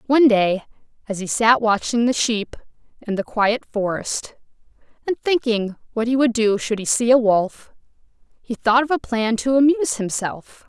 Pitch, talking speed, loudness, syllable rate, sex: 230 Hz, 175 wpm, -20 LUFS, 4.7 syllables/s, female